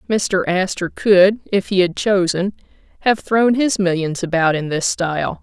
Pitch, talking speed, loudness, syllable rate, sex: 190 Hz, 165 wpm, -17 LUFS, 4.4 syllables/s, female